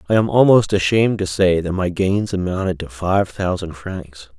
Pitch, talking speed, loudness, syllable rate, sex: 95 Hz, 190 wpm, -18 LUFS, 4.8 syllables/s, male